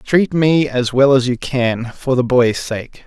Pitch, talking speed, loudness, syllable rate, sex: 130 Hz, 215 wpm, -16 LUFS, 3.7 syllables/s, male